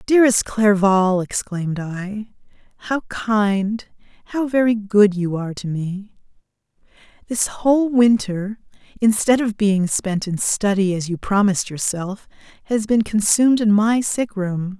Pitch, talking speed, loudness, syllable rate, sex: 205 Hz, 135 wpm, -19 LUFS, 4.2 syllables/s, female